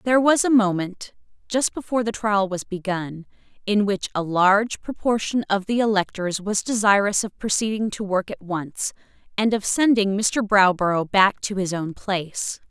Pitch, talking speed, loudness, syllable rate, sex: 205 Hz, 160 wpm, -22 LUFS, 4.8 syllables/s, female